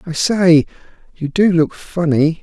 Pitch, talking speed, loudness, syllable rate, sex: 165 Hz, 150 wpm, -15 LUFS, 3.8 syllables/s, male